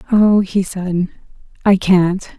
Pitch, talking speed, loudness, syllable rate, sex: 190 Hz, 125 wpm, -16 LUFS, 3.2 syllables/s, female